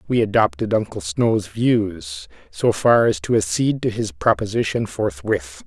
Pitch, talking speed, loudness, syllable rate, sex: 110 Hz, 150 wpm, -20 LUFS, 4.4 syllables/s, male